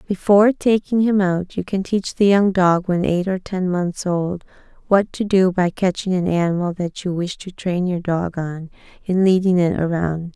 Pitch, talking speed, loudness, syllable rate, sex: 185 Hz, 205 wpm, -19 LUFS, 4.6 syllables/s, female